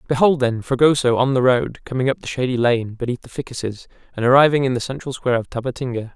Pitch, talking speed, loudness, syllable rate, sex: 130 Hz, 215 wpm, -19 LUFS, 6.5 syllables/s, male